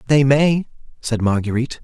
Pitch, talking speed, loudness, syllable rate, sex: 130 Hz, 130 wpm, -18 LUFS, 5.5 syllables/s, male